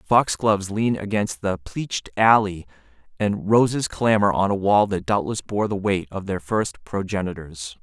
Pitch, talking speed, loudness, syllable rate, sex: 100 Hz, 160 wpm, -22 LUFS, 4.5 syllables/s, male